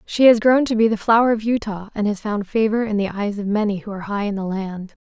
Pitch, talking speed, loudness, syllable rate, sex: 210 Hz, 285 wpm, -19 LUFS, 6.1 syllables/s, female